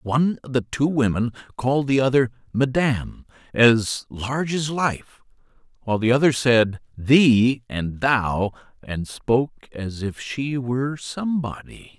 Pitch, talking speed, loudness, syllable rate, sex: 125 Hz, 135 wpm, -22 LUFS, 4.2 syllables/s, male